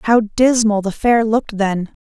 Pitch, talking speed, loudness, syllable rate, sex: 220 Hz, 175 wpm, -16 LUFS, 4.4 syllables/s, female